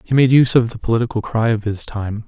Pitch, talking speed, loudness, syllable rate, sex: 115 Hz, 265 wpm, -17 LUFS, 6.5 syllables/s, male